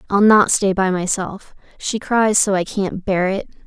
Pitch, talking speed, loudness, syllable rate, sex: 195 Hz, 195 wpm, -17 LUFS, 4.2 syllables/s, female